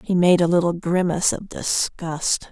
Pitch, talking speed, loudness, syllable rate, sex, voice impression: 175 Hz, 165 wpm, -20 LUFS, 4.6 syllables/s, female, feminine, adult-like, slightly powerful, bright, fluent, intellectual, unique, lively, slightly strict, slightly sharp